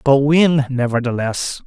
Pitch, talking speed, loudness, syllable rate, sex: 135 Hz, 110 wpm, -16 LUFS, 4.0 syllables/s, male